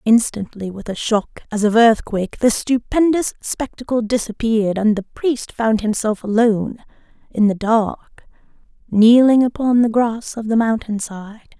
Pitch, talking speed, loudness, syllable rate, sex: 225 Hz, 145 wpm, -17 LUFS, 4.7 syllables/s, female